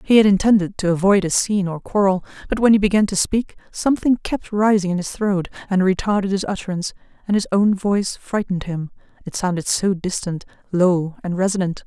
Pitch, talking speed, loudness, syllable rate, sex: 195 Hz, 190 wpm, -19 LUFS, 5.8 syllables/s, female